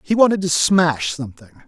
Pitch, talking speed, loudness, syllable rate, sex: 155 Hz, 180 wpm, -17 LUFS, 5.6 syllables/s, male